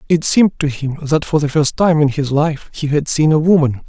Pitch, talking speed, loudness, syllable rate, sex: 150 Hz, 265 wpm, -15 LUFS, 5.3 syllables/s, male